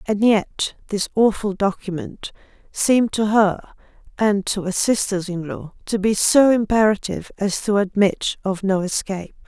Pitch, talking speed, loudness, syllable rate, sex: 205 Hz, 150 wpm, -20 LUFS, 4.5 syllables/s, female